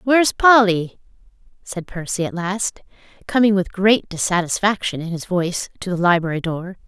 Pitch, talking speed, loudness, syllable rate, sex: 190 Hz, 150 wpm, -19 LUFS, 5.1 syllables/s, female